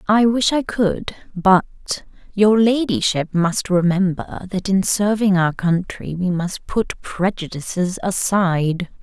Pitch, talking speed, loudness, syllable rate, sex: 190 Hz, 125 wpm, -19 LUFS, 3.9 syllables/s, female